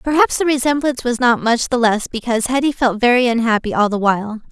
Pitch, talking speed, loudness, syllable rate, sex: 240 Hz, 215 wpm, -16 LUFS, 6.2 syllables/s, female